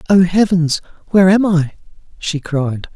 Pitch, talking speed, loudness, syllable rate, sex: 170 Hz, 140 wpm, -15 LUFS, 4.5 syllables/s, male